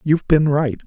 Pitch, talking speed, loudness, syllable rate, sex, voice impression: 150 Hz, 210 wpm, -17 LUFS, 5.4 syllables/s, male, masculine, middle-aged, relaxed, slightly weak, soft, raspy, calm, mature, wild, kind, modest